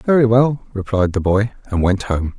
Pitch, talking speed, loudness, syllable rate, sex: 105 Hz, 200 wpm, -17 LUFS, 4.6 syllables/s, male